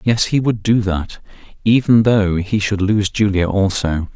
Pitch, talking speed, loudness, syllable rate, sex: 100 Hz, 175 wpm, -16 LUFS, 4.1 syllables/s, male